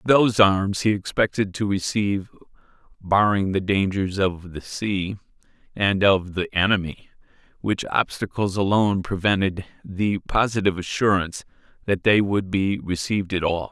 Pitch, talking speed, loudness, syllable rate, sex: 100 Hz, 130 wpm, -22 LUFS, 4.8 syllables/s, male